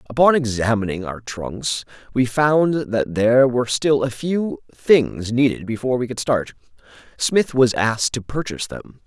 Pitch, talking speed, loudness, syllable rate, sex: 125 Hz, 160 wpm, -20 LUFS, 4.6 syllables/s, male